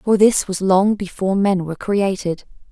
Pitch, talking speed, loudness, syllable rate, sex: 195 Hz, 175 wpm, -18 LUFS, 4.9 syllables/s, female